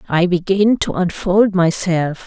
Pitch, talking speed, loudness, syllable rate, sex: 180 Hz, 135 wpm, -16 LUFS, 3.8 syllables/s, female